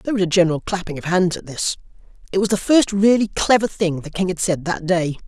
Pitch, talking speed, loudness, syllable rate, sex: 185 Hz, 250 wpm, -19 LUFS, 6.1 syllables/s, male